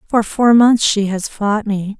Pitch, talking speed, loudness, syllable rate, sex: 215 Hz, 210 wpm, -14 LUFS, 3.9 syllables/s, female